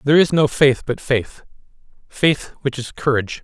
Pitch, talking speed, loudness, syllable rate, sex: 135 Hz, 155 wpm, -18 LUFS, 4.9 syllables/s, male